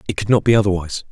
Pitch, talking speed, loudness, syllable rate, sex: 100 Hz, 270 wpm, -17 LUFS, 8.9 syllables/s, male